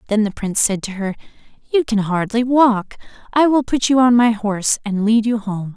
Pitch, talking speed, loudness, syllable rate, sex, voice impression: 225 Hz, 220 wpm, -17 LUFS, 5.1 syllables/s, female, feminine, adult-like, tensed, powerful, bright, clear, friendly, unique, very lively, intense, sharp